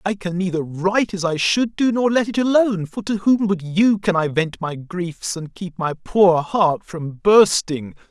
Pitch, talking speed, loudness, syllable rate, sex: 185 Hz, 215 wpm, -19 LUFS, 4.3 syllables/s, male